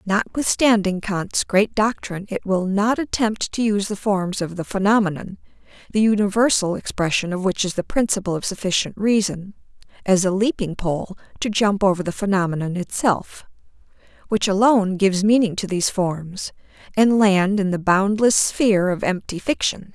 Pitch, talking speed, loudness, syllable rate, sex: 200 Hz, 155 wpm, -20 LUFS, 5.0 syllables/s, female